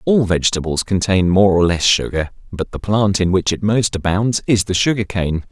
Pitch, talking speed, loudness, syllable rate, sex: 95 Hz, 205 wpm, -16 LUFS, 5.1 syllables/s, male